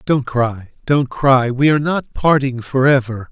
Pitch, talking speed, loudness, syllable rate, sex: 130 Hz, 180 wpm, -16 LUFS, 4.3 syllables/s, male